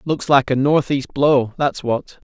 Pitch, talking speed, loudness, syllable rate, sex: 140 Hz, 180 wpm, -18 LUFS, 3.9 syllables/s, male